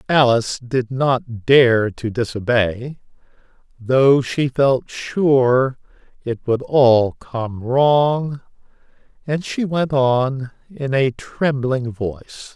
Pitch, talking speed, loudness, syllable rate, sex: 130 Hz, 110 wpm, -18 LUFS, 2.9 syllables/s, male